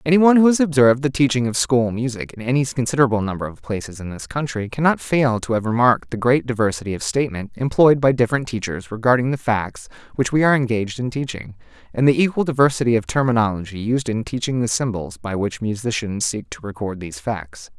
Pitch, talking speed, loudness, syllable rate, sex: 120 Hz, 205 wpm, -20 LUFS, 6.3 syllables/s, male